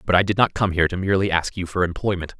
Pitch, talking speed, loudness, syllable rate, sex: 90 Hz, 300 wpm, -21 LUFS, 7.5 syllables/s, male